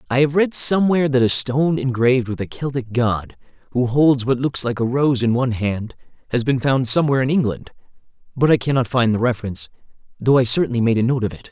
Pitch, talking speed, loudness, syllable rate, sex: 125 Hz, 220 wpm, -18 LUFS, 6.3 syllables/s, male